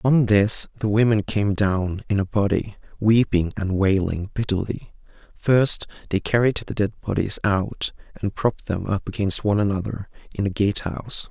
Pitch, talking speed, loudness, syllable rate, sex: 100 Hz, 160 wpm, -22 LUFS, 4.8 syllables/s, male